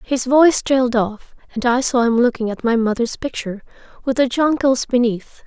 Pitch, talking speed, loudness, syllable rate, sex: 245 Hz, 185 wpm, -17 LUFS, 5.3 syllables/s, female